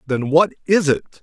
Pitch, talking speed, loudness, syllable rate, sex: 155 Hz, 195 wpm, -17 LUFS, 4.1 syllables/s, male